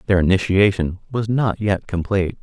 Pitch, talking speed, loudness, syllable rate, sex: 100 Hz, 150 wpm, -19 LUFS, 5.2 syllables/s, male